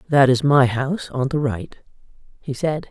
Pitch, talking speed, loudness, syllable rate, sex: 140 Hz, 185 wpm, -19 LUFS, 4.6 syllables/s, female